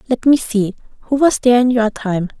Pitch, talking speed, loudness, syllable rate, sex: 235 Hz, 200 wpm, -15 LUFS, 5.8 syllables/s, female